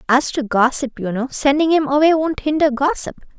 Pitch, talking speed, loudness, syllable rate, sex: 280 Hz, 195 wpm, -17 LUFS, 5.4 syllables/s, female